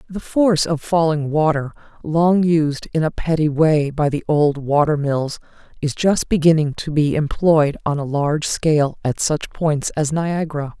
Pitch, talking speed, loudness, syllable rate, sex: 155 Hz, 170 wpm, -18 LUFS, 4.5 syllables/s, female